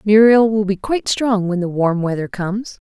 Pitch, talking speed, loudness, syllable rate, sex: 205 Hz, 210 wpm, -17 LUFS, 5.2 syllables/s, female